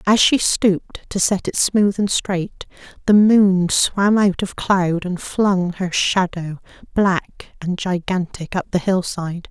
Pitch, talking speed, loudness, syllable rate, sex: 185 Hz, 160 wpm, -18 LUFS, 3.7 syllables/s, female